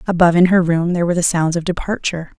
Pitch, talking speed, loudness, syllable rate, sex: 175 Hz, 250 wpm, -16 LUFS, 7.7 syllables/s, female